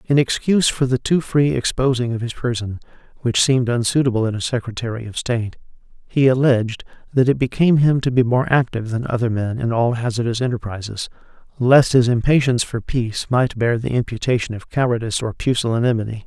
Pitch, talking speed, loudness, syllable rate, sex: 120 Hz, 175 wpm, -19 LUFS, 6.1 syllables/s, male